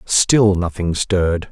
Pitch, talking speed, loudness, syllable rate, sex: 90 Hz, 120 wpm, -16 LUFS, 3.6 syllables/s, male